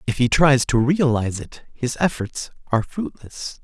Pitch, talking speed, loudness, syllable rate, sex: 130 Hz, 165 wpm, -21 LUFS, 4.6 syllables/s, male